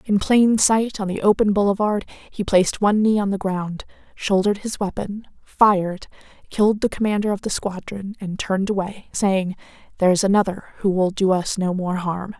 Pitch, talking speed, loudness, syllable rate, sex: 195 Hz, 180 wpm, -20 LUFS, 5.1 syllables/s, female